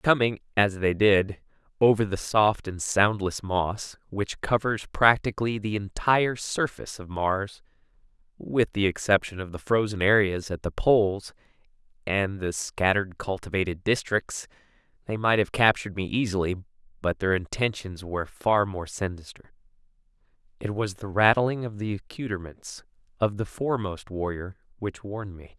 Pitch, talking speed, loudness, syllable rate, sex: 100 Hz, 140 wpm, -26 LUFS, 4.8 syllables/s, male